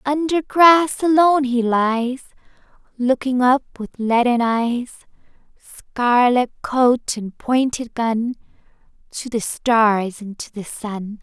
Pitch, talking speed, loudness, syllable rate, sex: 245 Hz, 120 wpm, -18 LUFS, 3.3 syllables/s, female